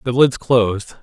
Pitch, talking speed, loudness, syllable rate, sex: 120 Hz, 175 wpm, -16 LUFS, 4.4 syllables/s, male